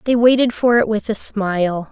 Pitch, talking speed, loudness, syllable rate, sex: 215 Hz, 220 wpm, -17 LUFS, 5.1 syllables/s, female